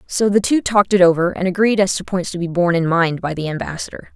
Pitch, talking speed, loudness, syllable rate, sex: 185 Hz, 275 wpm, -17 LUFS, 6.5 syllables/s, female